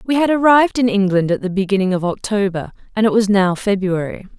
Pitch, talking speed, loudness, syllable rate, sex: 205 Hz, 205 wpm, -16 LUFS, 6.0 syllables/s, female